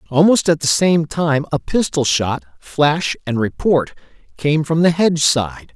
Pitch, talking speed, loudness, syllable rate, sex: 150 Hz, 165 wpm, -17 LUFS, 4.2 syllables/s, male